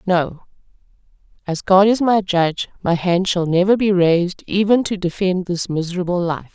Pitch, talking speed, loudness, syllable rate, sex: 185 Hz, 165 wpm, -18 LUFS, 4.9 syllables/s, female